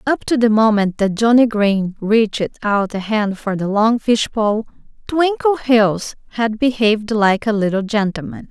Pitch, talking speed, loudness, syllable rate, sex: 220 Hz, 160 wpm, -17 LUFS, 4.4 syllables/s, female